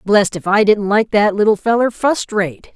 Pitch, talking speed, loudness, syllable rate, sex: 210 Hz, 220 wpm, -15 LUFS, 4.5 syllables/s, female